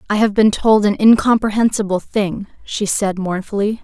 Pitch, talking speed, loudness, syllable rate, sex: 205 Hz, 155 wpm, -16 LUFS, 4.9 syllables/s, female